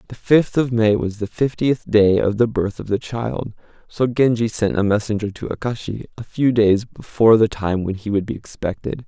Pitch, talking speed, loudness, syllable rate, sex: 110 Hz, 210 wpm, -19 LUFS, 5.0 syllables/s, male